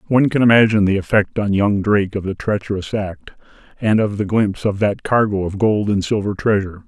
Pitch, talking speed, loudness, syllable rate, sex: 105 Hz, 210 wpm, -17 LUFS, 6.0 syllables/s, male